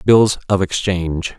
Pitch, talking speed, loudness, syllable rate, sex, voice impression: 95 Hz, 130 wpm, -17 LUFS, 4.2 syllables/s, male, masculine, adult-like, refreshing, slightly sincere